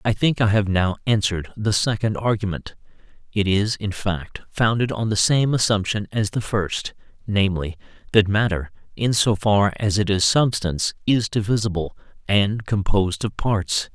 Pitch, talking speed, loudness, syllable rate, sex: 105 Hz, 155 wpm, -21 LUFS, 4.7 syllables/s, male